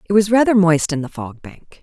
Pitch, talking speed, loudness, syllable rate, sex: 180 Hz, 265 wpm, -15 LUFS, 5.2 syllables/s, female